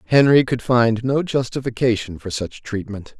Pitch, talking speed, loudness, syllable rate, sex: 120 Hz, 150 wpm, -19 LUFS, 4.7 syllables/s, male